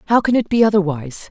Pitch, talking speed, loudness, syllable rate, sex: 195 Hz, 230 wpm, -17 LUFS, 7.2 syllables/s, female